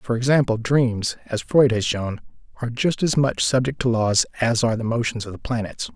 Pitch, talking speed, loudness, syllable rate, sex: 120 Hz, 210 wpm, -21 LUFS, 5.3 syllables/s, male